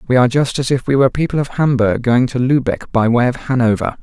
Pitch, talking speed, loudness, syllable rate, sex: 125 Hz, 255 wpm, -15 LUFS, 6.2 syllables/s, male